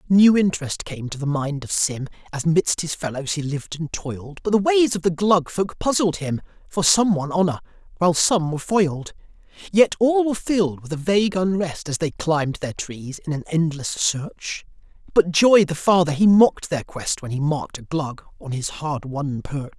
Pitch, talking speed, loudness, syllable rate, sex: 165 Hz, 205 wpm, -21 LUFS, 5.0 syllables/s, male